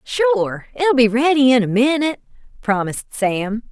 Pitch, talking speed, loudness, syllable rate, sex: 250 Hz, 145 wpm, -17 LUFS, 5.2 syllables/s, female